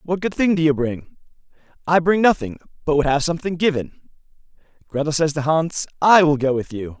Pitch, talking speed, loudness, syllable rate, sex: 155 Hz, 195 wpm, -19 LUFS, 5.7 syllables/s, male